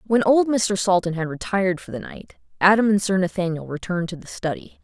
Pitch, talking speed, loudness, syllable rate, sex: 190 Hz, 210 wpm, -21 LUFS, 5.8 syllables/s, female